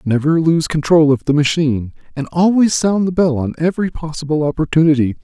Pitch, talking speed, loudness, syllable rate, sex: 155 Hz, 170 wpm, -15 LUFS, 5.9 syllables/s, male